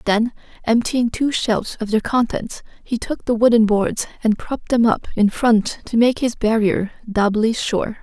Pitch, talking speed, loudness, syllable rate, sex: 225 Hz, 180 wpm, -19 LUFS, 4.5 syllables/s, female